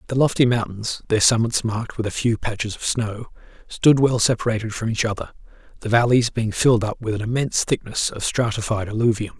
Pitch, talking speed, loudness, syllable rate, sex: 115 Hz, 190 wpm, -21 LUFS, 5.8 syllables/s, male